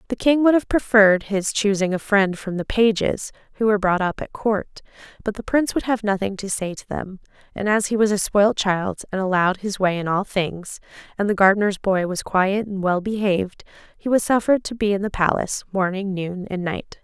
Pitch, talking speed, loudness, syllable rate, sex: 200 Hz, 220 wpm, -21 LUFS, 5.5 syllables/s, female